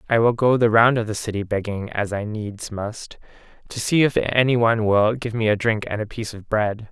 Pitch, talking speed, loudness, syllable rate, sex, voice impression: 110 Hz, 245 wpm, -21 LUFS, 5.3 syllables/s, male, masculine, adult-like, slightly tensed, slightly weak, soft, intellectual, slightly refreshing, calm, friendly, reassuring, kind, modest